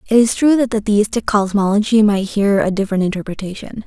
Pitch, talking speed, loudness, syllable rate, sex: 210 Hz, 185 wpm, -16 LUFS, 5.9 syllables/s, female